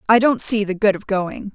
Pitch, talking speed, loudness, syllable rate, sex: 205 Hz, 270 wpm, -18 LUFS, 5.1 syllables/s, female